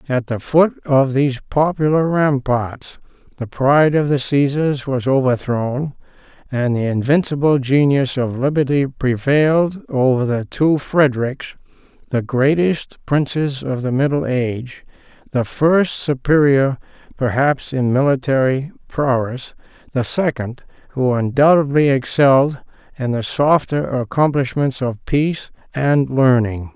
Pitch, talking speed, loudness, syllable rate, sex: 135 Hz, 115 wpm, -17 LUFS, 4.2 syllables/s, male